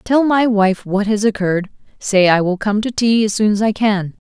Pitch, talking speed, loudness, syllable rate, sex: 210 Hz, 225 wpm, -16 LUFS, 4.9 syllables/s, female